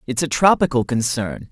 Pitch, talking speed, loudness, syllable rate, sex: 130 Hz, 160 wpm, -18 LUFS, 5.1 syllables/s, male